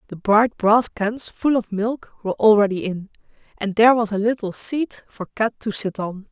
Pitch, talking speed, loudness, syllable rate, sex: 215 Hz, 200 wpm, -20 LUFS, 4.7 syllables/s, female